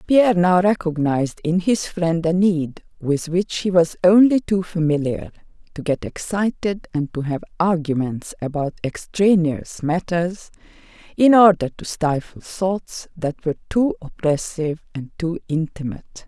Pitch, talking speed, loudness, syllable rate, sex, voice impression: 170 Hz, 135 wpm, -20 LUFS, 4.4 syllables/s, female, very feminine, very adult-like, slightly old, slightly thin, slightly relaxed, slightly weak, slightly bright, soft, very clear, slightly fluent, slightly raspy, slightly cool, intellectual, slightly refreshing, very sincere, calm, friendly, reassuring, slightly unique, elegant, slightly sweet, slightly lively, very kind, modest, slightly light